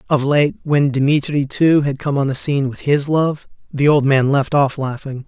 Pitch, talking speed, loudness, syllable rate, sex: 140 Hz, 215 wpm, -16 LUFS, 4.6 syllables/s, male